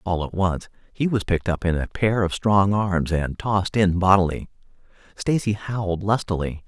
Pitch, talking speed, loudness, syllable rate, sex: 95 Hz, 180 wpm, -22 LUFS, 4.9 syllables/s, male